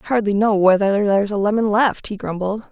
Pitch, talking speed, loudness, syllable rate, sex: 205 Hz, 220 wpm, -18 LUFS, 5.8 syllables/s, female